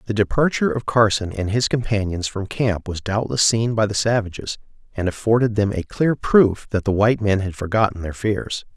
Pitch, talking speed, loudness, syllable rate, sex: 105 Hz, 200 wpm, -20 LUFS, 5.3 syllables/s, male